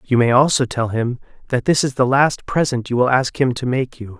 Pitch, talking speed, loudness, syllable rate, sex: 125 Hz, 255 wpm, -18 LUFS, 5.4 syllables/s, male